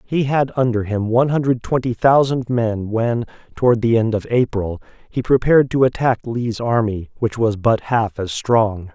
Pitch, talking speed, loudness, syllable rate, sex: 115 Hz, 180 wpm, -18 LUFS, 4.7 syllables/s, male